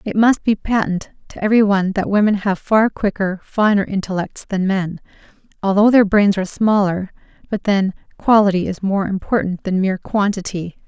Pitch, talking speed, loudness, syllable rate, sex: 200 Hz, 165 wpm, -17 LUFS, 5.3 syllables/s, female